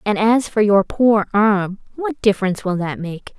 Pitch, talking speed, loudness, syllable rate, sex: 210 Hz, 195 wpm, -17 LUFS, 4.6 syllables/s, female